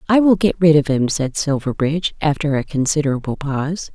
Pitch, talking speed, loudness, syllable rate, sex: 150 Hz, 180 wpm, -18 LUFS, 5.7 syllables/s, female